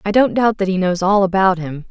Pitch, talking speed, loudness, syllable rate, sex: 190 Hz, 285 wpm, -16 LUFS, 5.6 syllables/s, female